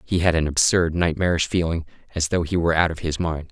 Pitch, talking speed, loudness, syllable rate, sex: 85 Hz, 240 wpm, -21 LUFS, 6.1 syllables/s, male